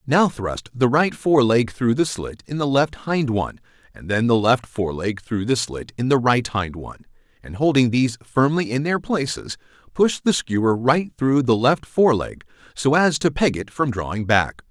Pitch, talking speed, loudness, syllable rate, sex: 130 Hz, 210 wpm, -20 LUFS, 4.7 syllables/s, male